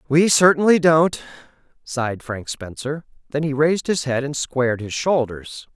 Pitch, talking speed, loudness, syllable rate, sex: 145 Hz, 155 wpm, -20 LUFS, 4.7 syllables/s, male